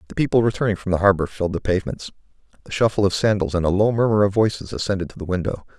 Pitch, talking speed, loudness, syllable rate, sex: 100 Hz, 240 wpm, -21 LUFS, 7.5 syllables/s, male